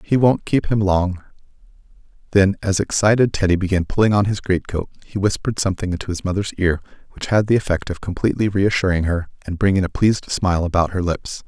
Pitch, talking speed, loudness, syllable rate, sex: 95 Hz, 200 wpm, -19 LUFS, 6.2 syllables/s, male